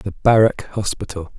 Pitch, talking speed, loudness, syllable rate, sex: 100 Hz, 130 wpm, -18 LUFS, 4.6 syllables/s, male